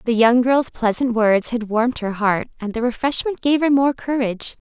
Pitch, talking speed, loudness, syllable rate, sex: 240 Hz, 205 wpm, -19 LUFS, 5.1 syllables/s, female